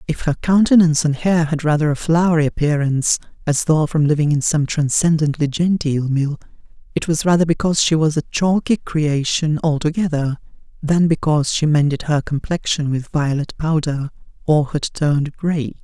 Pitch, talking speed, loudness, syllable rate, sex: 155 Hz, 160 wpm, -18 LUFS, 5.1 syllables/s, female